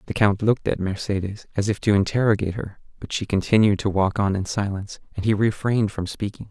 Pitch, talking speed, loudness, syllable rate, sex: 100 Hz, 210 wpm, -22 LUFS, 6.3 syllables/s, male